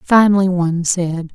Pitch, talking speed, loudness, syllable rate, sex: 180 Hz, 135 wpm, -15 LUFS, 4.8 syllables/s, female